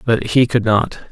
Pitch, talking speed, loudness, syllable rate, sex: 115 Hz, 215 wpm, -16 LUFS, 4.0 syllables/s, male